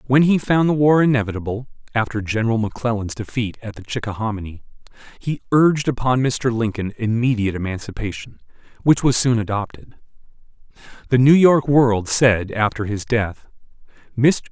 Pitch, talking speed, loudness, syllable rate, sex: 120 Hz, 135 wpm, -19 LUFS, 5.5 syllables/s, male